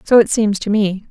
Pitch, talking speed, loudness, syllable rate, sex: 205 Hz, 270 wpm, -15 LUFS, 5.0 syllables/s, female